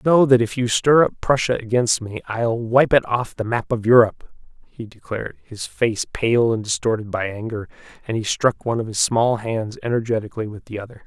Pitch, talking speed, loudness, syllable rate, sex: 115 Hz, 205 wpm, -20 LUFS, 5.3 syllables/s, male